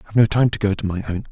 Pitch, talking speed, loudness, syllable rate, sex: 105 Hz, 365 wpm, -20 LUFS, 8.0 syllables/s, male